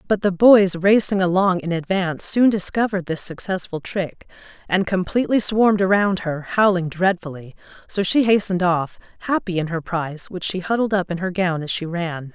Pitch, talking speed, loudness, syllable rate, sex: 185 Hz, 180 wpm, -20 LUFS, 5.3 syllables/s, female